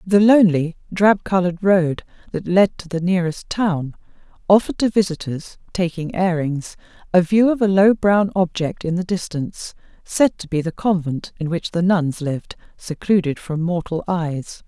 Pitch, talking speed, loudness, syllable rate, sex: 180 Hz, 165 wpm, -19 LUFS, 4.8 syllables/s, female